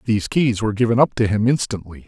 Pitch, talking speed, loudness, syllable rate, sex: 110 Hz, 230 wpm, -19 LUFS, 6.7 syllables/s, male